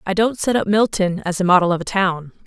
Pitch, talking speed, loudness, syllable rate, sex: 190 Hz, 270 wpm, -18 LUFS, 5.8 syllables/s, female